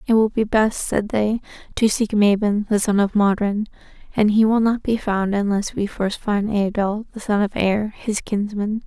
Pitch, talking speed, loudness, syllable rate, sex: 210 Hz, 205 wpm, -20 LUFS, 4.5 syllables/s, female